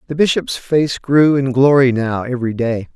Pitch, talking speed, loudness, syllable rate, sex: 130 Hz, 185 wpm, -15 LUFS, 4.8 syllables/s, male